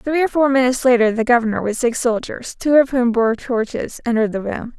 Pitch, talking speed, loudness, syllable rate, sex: 245 Hz, 225 wpm, -17 LUFS, 5.8 syllables/s, female